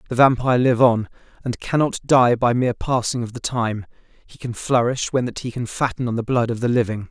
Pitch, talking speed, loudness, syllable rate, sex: 120 Hz, 230 wpm, -20 LUFS, 5.6 syllables/s, male